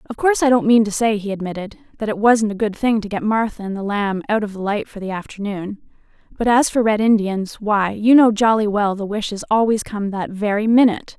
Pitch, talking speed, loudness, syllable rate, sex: 215 Hz, 240 wpm, -18 LUFS, 5.7 syllables/s, female